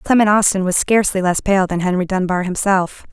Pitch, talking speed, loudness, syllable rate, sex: 190 Hz, 190 wpm, -16 LUFS, 5.7 syllables/s, female